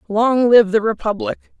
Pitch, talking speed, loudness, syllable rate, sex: 225 Hz, 150 wpm, -16 LUFS, 4.9 syllables/s, female